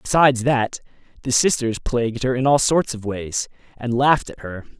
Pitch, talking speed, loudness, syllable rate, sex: 125 Hz, 190 wpm, -20 LUFS, 5.1 syllables/s, male